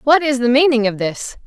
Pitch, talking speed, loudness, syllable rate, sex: 255 Hz, 245 wpm, -15 LUFS, 5.3 syllables/s, female